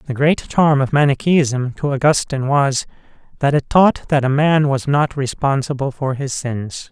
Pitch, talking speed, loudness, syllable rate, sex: 140 Hz, 175 wpm, -17 LUFS, 4.4 syllables/s, male